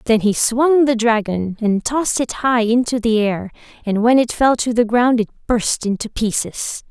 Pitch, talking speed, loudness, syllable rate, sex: 230 Hz, 200 wpm, -17 LUFS, 4.6 syllables/s, female